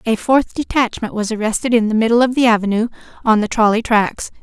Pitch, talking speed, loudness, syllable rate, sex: 225 Hz, 205 wpm, -16 LUFS, 5.9 syllables/s, female